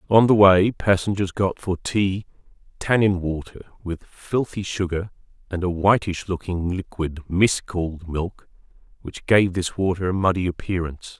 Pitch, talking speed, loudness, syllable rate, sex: 95 Hz, 145 wpm, -22 LUFS, 4.5 syllables/s, male